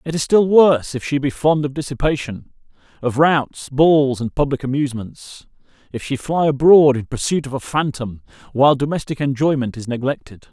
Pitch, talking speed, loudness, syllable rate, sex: 140 Hz, 165 wpm, -17 LUFS, 5.3 syllables/s, male